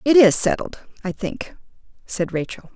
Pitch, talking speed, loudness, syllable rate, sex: 210 Hz, 130 wpm, -21 LUFS, 4.6 syllables/s, female